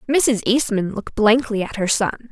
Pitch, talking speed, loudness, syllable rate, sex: 225 Hz, 180 wpm, -19 LUFS, 4.7 syllables/s, female